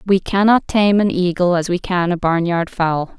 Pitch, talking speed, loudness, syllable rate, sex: 180 Hz, 225 wpm, -16 LUFS, 4.6 syllables/s, female